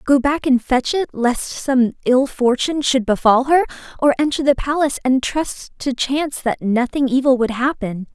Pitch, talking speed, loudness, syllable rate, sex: 265 Hz, 185 wpm, -18 LUFS, 4.8 syllables/s, female